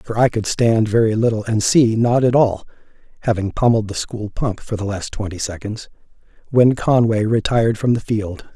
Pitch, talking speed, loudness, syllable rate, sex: 110 Hz, 190 wpm, -18 LUFS, 3.4 syllables/s, male